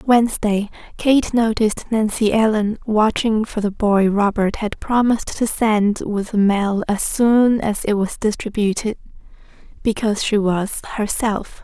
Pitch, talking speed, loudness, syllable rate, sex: 215 Hz, 140 wpm, -18 LUFS, 4.3 syllables/s, female